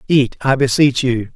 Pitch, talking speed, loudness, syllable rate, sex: 130 Hz, 175 wpm, -15 LUFS, 4.5 syllables/s, male